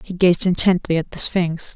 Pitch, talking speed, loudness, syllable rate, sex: 175 Hz, 205 wpm, -17 LUFS, 4.9 syllables/s, female